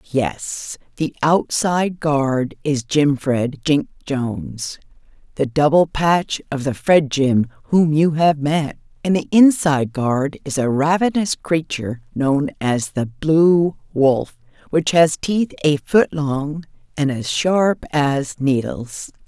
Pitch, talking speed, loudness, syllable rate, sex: 145 Hz, 130 wpm, -18 LUFS, 3.4 syllables/s, female